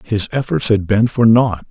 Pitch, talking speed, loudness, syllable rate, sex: 110 Hz, 210 wpm, -15 LUFS, 4.5 syllables/s, male